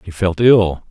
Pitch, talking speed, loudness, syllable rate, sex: 95 Hz, 200 wpm, -14 LUFS, 3.8 syllables/s, male